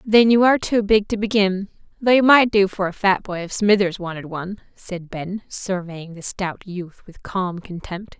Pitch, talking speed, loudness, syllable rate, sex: 195 Hz, 205 wpm, -20 LUFS, 4.6 syllables/s, female